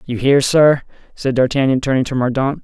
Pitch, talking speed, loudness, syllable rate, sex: 135 Hz, 180 wpm, -16 LUFS, 5.4 syllables/s, male